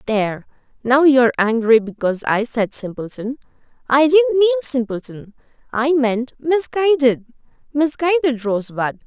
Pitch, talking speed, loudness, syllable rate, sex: 260 Hz, 105 wpm, -18 LUFS, 5.1 syllables/s, female